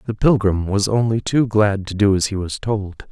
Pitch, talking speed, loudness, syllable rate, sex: 105 Hz, 230 wpm, -18 LUFS, 4.8 syllables/s, male